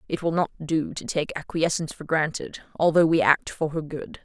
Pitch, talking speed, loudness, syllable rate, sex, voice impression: 160 Hz, 200 wpm, -24 LUFS, 5.2 syllables/s, female, feminine, slightly gender-neutral, adult-like, slightly middle-aged, slightly thin, tensed, slightly powerful, slightly dark, hard, clear, fluent, cool, intellectual, slightly refreshing, sincere, calm, slightly friendly, slightly reassuring, unique, slightly elegant, wild, slightly sweet, slightly lively, slightly strict, slightly intense, sharp, slightly light